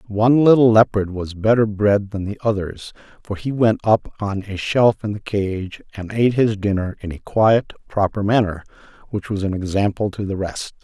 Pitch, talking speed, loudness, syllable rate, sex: 105 Hz, 195 wpm, -19 LUFS, 4.9 syllables/s, male